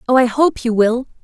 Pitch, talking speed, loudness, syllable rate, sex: 245 Hz, 195 wpm, -15 LUFS, 4.4 syllables/s, female